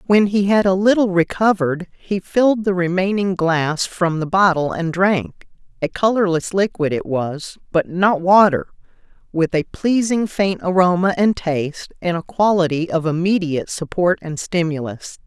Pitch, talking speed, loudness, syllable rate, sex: 180 Hz, 150 wpm, -18 LUFS, 4.6 syllables/s, female